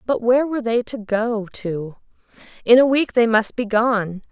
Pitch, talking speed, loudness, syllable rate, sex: 230 Hz, 195 wpm, -19 LUFS, 4.6 syllables/s, female